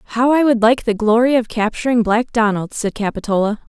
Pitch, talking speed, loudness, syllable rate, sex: 225 Hz, 190 wpm, -16 LUFS, 5.4 syllables/s, female